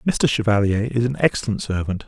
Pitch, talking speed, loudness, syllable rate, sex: 110 Hz, 175 wpm, -20 LUFS, 5.9 syllables/s, male